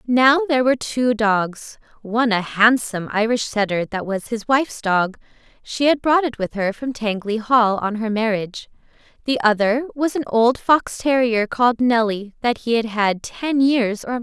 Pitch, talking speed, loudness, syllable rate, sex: 230 Hz, 185 wpm, -19 LUFS, 3.8 syllables/s, female